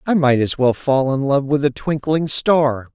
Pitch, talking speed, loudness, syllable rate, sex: 140 Hz, 225 wpm, -17 LUFS, 4.4 syllables/s, male